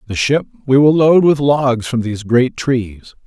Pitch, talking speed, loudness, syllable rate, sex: 130 Hz, 200 wpm, -14 LUFS, 4.4 syllables/s, male